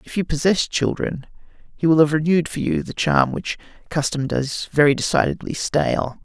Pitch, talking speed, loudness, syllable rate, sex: 140 Hz, 175 wpm, -20 LUFS, 5.3 syllables/s, male